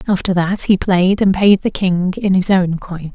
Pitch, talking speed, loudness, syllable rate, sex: 185 Hz, 230 wpm, -15 LUFS, 4.4 syllables/s, female